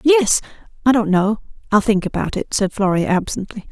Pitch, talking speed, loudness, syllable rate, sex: 215 Hz, 145 wpm, -18 LUFS, 5.2 syllables/s, female